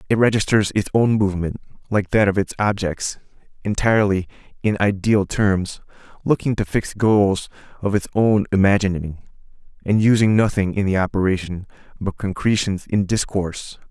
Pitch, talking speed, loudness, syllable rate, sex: 100 Hz, 140 wpm, -20 LUFS, 5.2 syllables/s, male